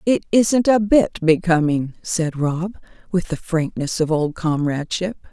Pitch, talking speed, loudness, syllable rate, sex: 175 Hz, 145 wpm, -19 LUFS, 4.2 syllables/s, female